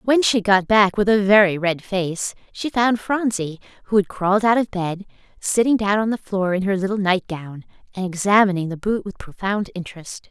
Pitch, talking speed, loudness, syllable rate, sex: 200 Hz, 200 wpm, -20 LUFS, 5.0 syllables/s, female